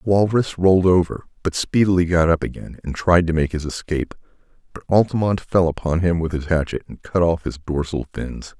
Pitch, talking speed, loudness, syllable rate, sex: 85 Hz, 200 wpm, -20 LUFS, 5.7 syllables/s, male